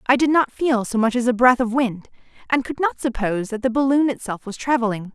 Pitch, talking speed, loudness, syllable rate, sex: 245 Hz, 245 wpm, -20 LUFS, 5.9 syllables/s, female